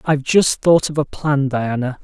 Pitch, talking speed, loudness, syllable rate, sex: 140 Hz, 205 wpm, -17 LUFS, 4.7 syllables/s, male